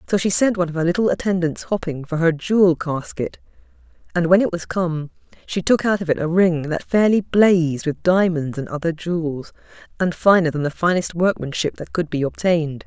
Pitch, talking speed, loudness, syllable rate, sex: 170 Hz, 200 wpm, -20 LUFS, 5.5 syllables/s, female